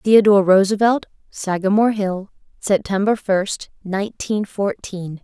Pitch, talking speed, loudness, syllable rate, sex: 200 Hz, 90 wpm, -19 LUFS, 4.5 syllables/s, female